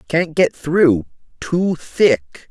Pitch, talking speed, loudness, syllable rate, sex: 150 Hz, 95 wpm, -17 LUFS, 2.6 syllables/s, male